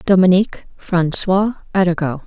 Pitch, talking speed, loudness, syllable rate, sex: 180 Hz, 80 wpm, -16 LUFS, 4.9 syllables/s, female